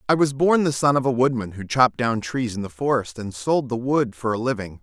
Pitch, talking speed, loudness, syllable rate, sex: 125 Hz, 275 wpm, -22 LUFS, 5.6 syllables/s, male